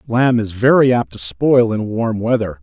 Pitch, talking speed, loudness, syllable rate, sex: 115 Hz, 205 wpm, -16 LUFS, 4.5 syllables/s, male